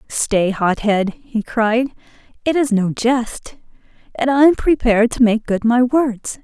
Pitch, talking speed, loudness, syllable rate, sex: 235 Hz, 160 wpm, -17 LUFS, 3.9 syllables/s, female